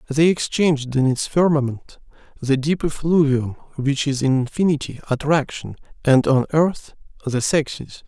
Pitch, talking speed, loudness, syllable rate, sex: 145 Hz, 135 wpm, -20 LUFS, 4.4 syllables/s, male